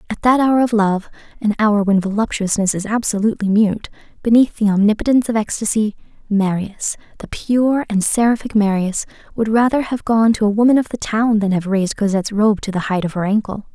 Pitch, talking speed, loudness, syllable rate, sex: 215 Hz, 190 wpm, -17 LUFS, 5.7 syllables/s, female